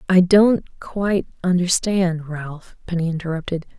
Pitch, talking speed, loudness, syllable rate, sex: 175 Hz, 95 wpm, -20 LUFS, 4.3 syllables/s, female